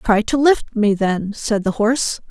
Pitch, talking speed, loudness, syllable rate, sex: 220 Hz, 210 wpm, -18 LUFS, 4.2 syllables/s, female